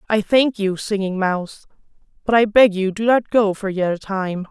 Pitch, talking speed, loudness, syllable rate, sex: 205 Hz, 215 wpm, -18 LUFS, 4.9 syllables/s, female